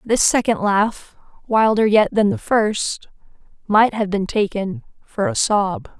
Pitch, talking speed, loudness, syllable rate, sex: 215 Hz, 150 wpm, -18 LUFS, 3.8 syllables/s, female